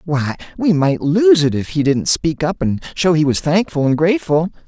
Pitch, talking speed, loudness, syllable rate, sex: 160 Hz, 220 wpm, -16 LUFS, 4.9 syllables/s, male